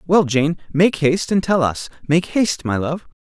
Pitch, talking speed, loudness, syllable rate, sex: 160 Hz, 205 wpm, -18 LUFS, 4.9 syllables/s, male